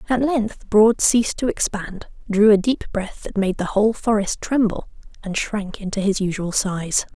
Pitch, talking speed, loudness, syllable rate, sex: 210 Hz, 185 wpm, -20 LUFS, 4.6 syllables/s, female